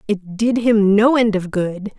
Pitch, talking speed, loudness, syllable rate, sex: 210 Hz, 210 wpm, -17 LUFS, 3.9 syllables/s, female